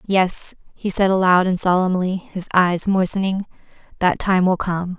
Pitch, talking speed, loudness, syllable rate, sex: 185 Hz, 155 wpm, -19 LUFS, 4.4 syllables/s, female